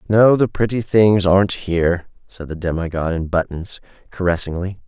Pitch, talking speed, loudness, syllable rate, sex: 95 Hz, 160 wpm, -18 LUFS, 5.3 syllables/s, male